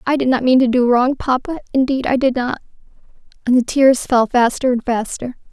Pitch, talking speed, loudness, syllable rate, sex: 255 Hz, 205 wpm, -16 LUFS, 5.4 syllables/s, female